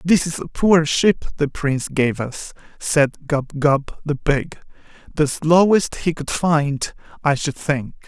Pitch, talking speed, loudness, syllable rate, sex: 150 Hz, 155 wpm, -19 LUFS, 3.6 syllables/s, male